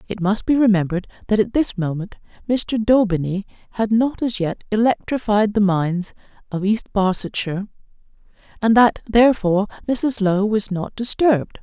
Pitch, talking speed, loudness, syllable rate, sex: 210 Hz, 145 wpm, -19 LUFS, 5.0 syllables/s, female